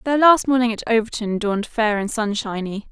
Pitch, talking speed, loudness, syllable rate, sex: 225 Hz, 185 wpm, -20 LUFS, 5.5 syllables/s, female